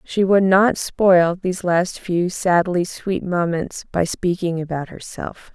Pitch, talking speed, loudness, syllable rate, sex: 180 Hz, 150 wpm, -19 LUFS, 3.7 syllables/s, female